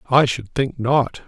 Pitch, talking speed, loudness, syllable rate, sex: 130 Hz, 190 wpm, -20 LUFS, 3.8 syllables/s, male